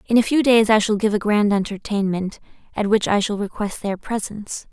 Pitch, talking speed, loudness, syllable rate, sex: 210 Hz, 215 wpm, -20 LUFS, 5.5 syllables/s, female